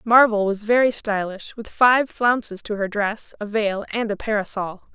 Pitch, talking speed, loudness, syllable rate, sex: 215 Hz, 180 wpm, -21 LUFS, 4.5 syllables/s, female